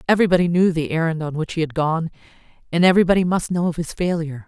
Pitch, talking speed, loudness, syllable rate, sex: 165 Hz, 215 wpm, -19 LUFS, 7.3 syllables/s, female